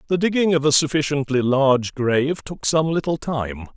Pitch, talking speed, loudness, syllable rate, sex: 145 Hz, 175 wpm, -20 LUFS, 5.2 syllables/s, male